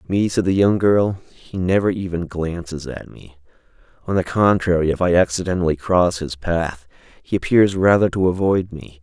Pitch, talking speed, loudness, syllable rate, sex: 90 Hz, 175 wpm, -19 LUFS, 4.9 syllables/s, male